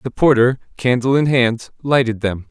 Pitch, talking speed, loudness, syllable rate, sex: 125 Hz, 165 wpm, -16 LUFS, 4.7 syllables/s, male